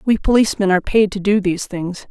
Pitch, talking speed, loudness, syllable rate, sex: 195 Hz, 230 wpm, -17 LUFS, 6.6 syllables/s, female